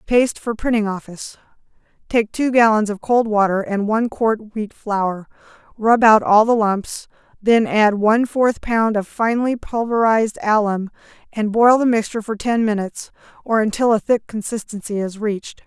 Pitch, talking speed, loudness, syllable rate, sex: 215 Hz, 160 wpm, -18 LUFS, 5.1 syllables/s, female